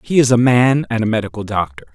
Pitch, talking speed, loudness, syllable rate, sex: 115 Hz, 245 wpm, -15 LUFS, 6.4 syllables/s, male